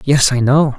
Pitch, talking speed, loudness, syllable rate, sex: 135 Hz, 230 wpm, -13 LUFS, 4.4 syllables/s, male